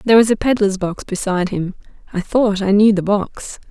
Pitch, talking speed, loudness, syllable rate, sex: 200 Hz, 210 wpm, -17 LUFS, 5.4 syllables/s, female